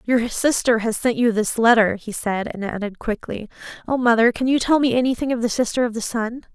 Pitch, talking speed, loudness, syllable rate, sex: 230 Hz, 230 wpm, -20 LUFS, 5.5 syllables/s, female